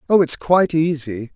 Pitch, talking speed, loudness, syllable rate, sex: 155 Hz, 175 wpm, -18 LUFS, 5.1 syllables/s, male